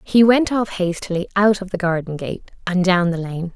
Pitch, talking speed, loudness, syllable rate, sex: 185 Hz, 220 wpm, -19 LUFS, 5.0 syllables/s, female